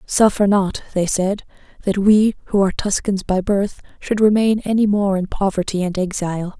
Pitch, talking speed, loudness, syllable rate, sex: 195 Hz, 175 wpm, -18 LUFS, 5.0 syllables/s, female